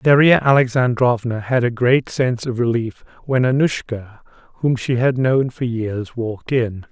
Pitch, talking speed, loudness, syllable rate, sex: 125 Hz, 155 wpm, -18 LUFS, 4.5 syllables/s, male